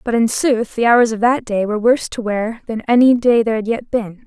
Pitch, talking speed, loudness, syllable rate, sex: 230 Hz, 265 wpm, -16 LUFS, 5.6 syllables/s, female